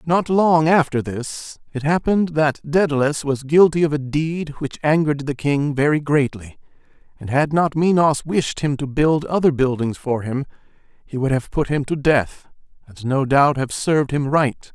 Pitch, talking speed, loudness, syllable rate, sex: 145 Hz, 185 wpm, -19 LUFS, 4.6 syllables/s, male